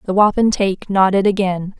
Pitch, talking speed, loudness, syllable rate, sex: 195 Hz, 135 wpm, -16 LUFS, 5.5 syllables/s, female